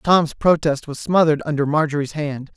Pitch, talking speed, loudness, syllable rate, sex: 150 Hz, 165 wpm, -19 LUFS, 5.3 syllables/s, male